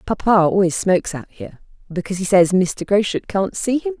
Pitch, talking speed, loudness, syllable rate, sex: 195 Hz, 195 wpm, -18 LUFS, 5.6 syllables/s, female